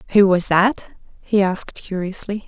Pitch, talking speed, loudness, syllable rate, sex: 195 Hz, 145 wpm, -19 LUFS, 4.7 syllables/s, female